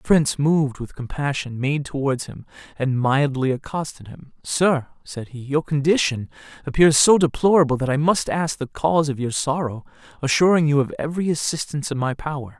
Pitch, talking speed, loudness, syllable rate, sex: 145 Hz, 175 wpm, -21 LUFS, 5.4 syllables/s, male